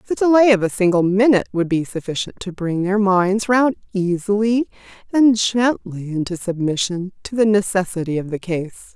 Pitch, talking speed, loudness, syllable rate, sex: 195 Hz, 165 wpm, -18 LUFS, 5.1 syllables/s, female